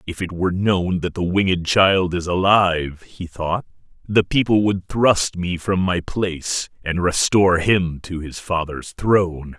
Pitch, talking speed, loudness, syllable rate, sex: 90 Hz, 170 wpm, -19 LUFS, 4.2 syllables/s, male